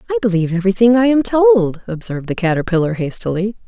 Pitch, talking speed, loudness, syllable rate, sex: 205 Hz, 165 wpm, -16 LUFS, 6.7 syllables/s, female